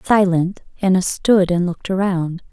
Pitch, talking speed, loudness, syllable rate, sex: 185 Hz, 145 wpm, -18 LUFS, 4.7 syllables/s, female